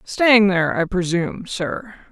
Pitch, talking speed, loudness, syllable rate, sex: 195 Hz, 140 wpm, -18 LUFS, 4.4 syllables/s, female